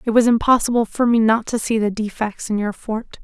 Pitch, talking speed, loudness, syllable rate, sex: 225 Hz, 240 wpm, -19 LUFS, 5.5 syllables/s, female